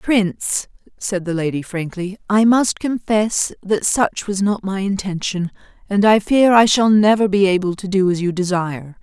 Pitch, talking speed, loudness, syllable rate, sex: 195 Hz, 180 wpm, -17 LUFS, 4.5 syllables/s, female